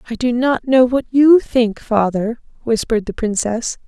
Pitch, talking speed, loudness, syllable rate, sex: 235 Hz, 170 wpm, -16 LUFS, 4.5 syllables/s, female